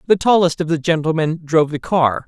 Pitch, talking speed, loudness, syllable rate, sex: 160 Hz, 210 wpm, -17 LUFS, 5.8 syllables/s, male